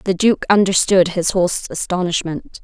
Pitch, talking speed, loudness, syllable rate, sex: 185 Hz, 135 wpm, -17 LUFS, 4.5 syllables/s, female